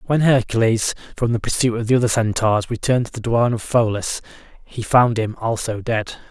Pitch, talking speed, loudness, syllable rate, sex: 115 Hz, 190 wpm, -19 LUFS, 5.5 syllables/s, male